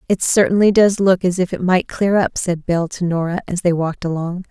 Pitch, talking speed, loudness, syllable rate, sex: 180 Hz, 240 wpm, -17 LUFS, 5.7 syllables/s, female